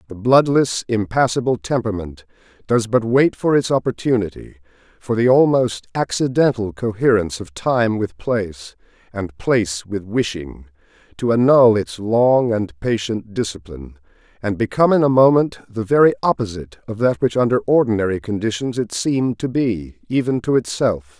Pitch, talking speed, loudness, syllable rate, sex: 110 Hz, 145 wpm, -18 LUFS, 5.1 syllables/s, male